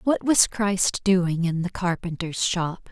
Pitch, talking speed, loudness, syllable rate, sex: 185 Hz, 165 wpm, -23 LUFS, 3.6 syllables/s, female